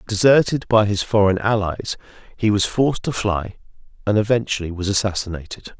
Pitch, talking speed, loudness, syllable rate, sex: 105 Hz, 145 wpm, -19 LUFS, 5.4 syllables/s, male